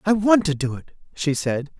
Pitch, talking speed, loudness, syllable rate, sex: 160 Hz, 235 wpm, -21 LUFS, 4.9 syllables/s, male